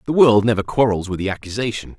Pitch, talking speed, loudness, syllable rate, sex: 110 Hz, 210 wpm, -18 LUFS, 6.5 syllables/s, male